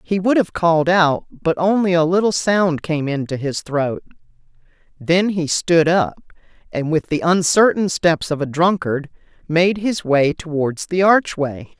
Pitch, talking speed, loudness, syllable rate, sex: 170 Hz, 165 wpm, -18 LUFS, 4.2 syllables/s, female